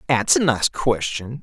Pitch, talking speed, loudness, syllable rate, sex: 115 Hz, 170 wpm, -19 LUFS, 4.0 syllables/s, male